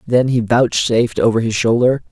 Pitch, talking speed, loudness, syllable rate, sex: 120 Hz, 170 wpm, -15 LUFS, 5.2 syllables/s, male